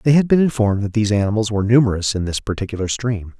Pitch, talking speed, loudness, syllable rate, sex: 110 Hz, 230 wpm, -18 LUFS, 7.3 syllables/s, male